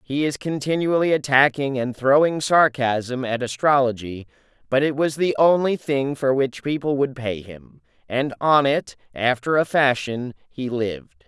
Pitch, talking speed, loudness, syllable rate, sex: 135 Hz, 155 wpm, -21 LUFS, 4.4 syllables/s, male